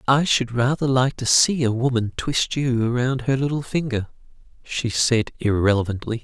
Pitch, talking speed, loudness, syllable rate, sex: 125 Hz, 165 wpm, -21 LUFS, 4.6 syllables/s, male